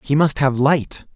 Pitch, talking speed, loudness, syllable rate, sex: 140 Hz, 205 wpm, -17 LUFS, 4.0 syllables/s, male